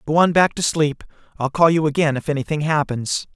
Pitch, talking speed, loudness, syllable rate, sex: 150 Hz, 215 wpm, -19 LUFS, 5.7 syllables/s, male